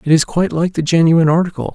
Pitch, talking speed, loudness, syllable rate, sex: 165 Hz, 240 wpm, -14 LUFS, 7.3 syllables/s, male